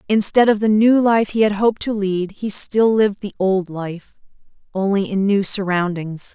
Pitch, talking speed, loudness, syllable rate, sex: 200 Hz, 190 wpm, -18 LUFS, 4.7 syllables/s, female